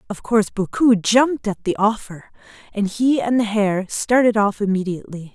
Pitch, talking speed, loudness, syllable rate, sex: 210 Hz, 170 wpm, -19 LUFS, 5.1 syllables/s, female